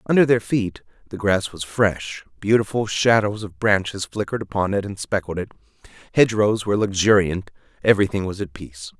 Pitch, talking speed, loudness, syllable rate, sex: 100 Hz, 160 wpm, -21 LUFS, 5.7 syllables/s, male